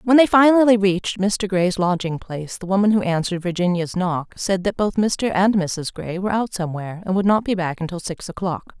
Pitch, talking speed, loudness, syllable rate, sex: 190 Hz, 220 wpm, -20 LUFS, 5.6 syllables/s, female